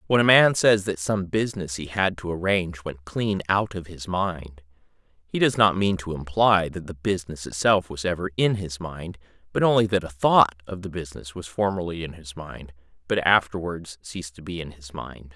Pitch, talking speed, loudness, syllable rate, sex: 90 Hz, 205 wpm, -23 LUFS, 5.1 syllables/s, male